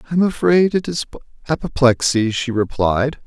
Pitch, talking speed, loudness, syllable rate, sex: 140 Hz, 130 wpm, -18 LUFS, 4.6 syllables/s, male